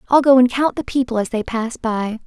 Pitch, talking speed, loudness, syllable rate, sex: 240 Hz, 265 wpm, -18 LUFS, 5.5 syllables/s, female